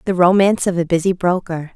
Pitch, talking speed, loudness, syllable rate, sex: 180 Hz, 205 wpm, -16 LUFS, 6.2 syllables/s, female